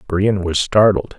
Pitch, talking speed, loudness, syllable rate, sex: 95 Hz, 150 wpm, -16 LUFS, 3.9 syllables/s, male